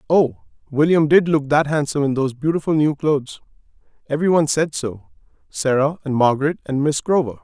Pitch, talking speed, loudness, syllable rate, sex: 145 Hz, 155 wpm, -19 LUFS, 6.0 syllables/s, male